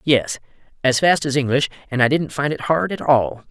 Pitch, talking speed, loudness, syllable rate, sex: 140 Hz, 205 wpm, -19 LUFS, 5.1 syllables/s, male